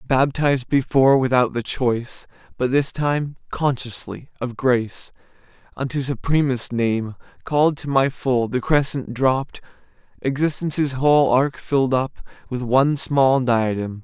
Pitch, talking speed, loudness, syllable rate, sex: 130 Hz, 130 wpm, -20 LUFS, 4.5 syllables/s, male